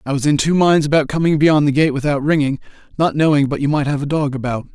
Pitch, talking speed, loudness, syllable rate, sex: 145 Hz, 265 wpm, -16 LUFS, 6.5 syllables/s, male